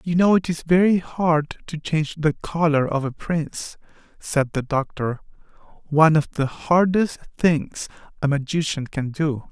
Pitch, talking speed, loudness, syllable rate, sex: 155 Hz, 150 wpm, -21 LUFS, 4.5 syllables/s, male